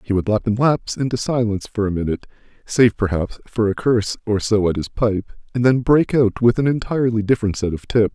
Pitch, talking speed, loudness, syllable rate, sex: 110 Hz, 215 wpm, -19 LUFS, 6.0 syllables/s, male